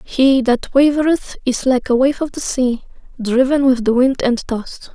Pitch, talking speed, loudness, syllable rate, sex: 260 Hz, 195 wpm, -16 LUFS, 4.6 syllables/s, female